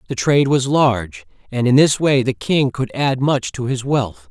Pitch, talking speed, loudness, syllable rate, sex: 130 Hz, 225 wpm, -17 LUFS, 4.7 syllables/s, male